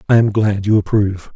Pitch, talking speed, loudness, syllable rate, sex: 105 Hz, 220 wpm, -16 LUFS, 6.1 syllables/s, male